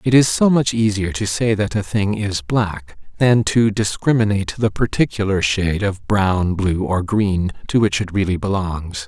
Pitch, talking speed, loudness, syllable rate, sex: 100 Hz, 185 wpm, -18 LUFS, 4.6 syllables/s, male